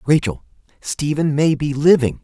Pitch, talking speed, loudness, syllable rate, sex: 145 Hz, 135 wpm, -18 LUFS, 4.5 syllables/s, male